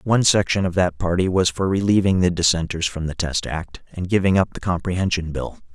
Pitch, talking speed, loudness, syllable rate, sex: 90 Hz, 210 wpm, -20 LUFS, 5.7 syllables/s, male